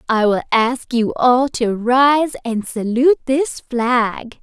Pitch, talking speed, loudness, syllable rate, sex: 245 Hz, 150 wpm, -17 LUFS, 4.4 syllables/s, female